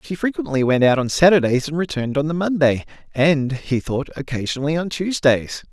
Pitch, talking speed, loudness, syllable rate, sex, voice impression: 150 Hz, 180 wpm, -19 LUFS, 5.6 syllables/s, male, masculine, adult-like, slightly relaxed, fluent, slightly raspy, cool, sincere, slightly friendly, wild, slightly strict